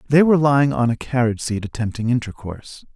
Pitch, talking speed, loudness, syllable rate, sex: 125 Hz, 185 wpm, -19 LUFS, 6.6 syllables/s, male